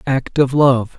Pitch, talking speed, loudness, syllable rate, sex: 130 Hz, 185 wpm, -15 LUFS, 3.5 syllables/s, male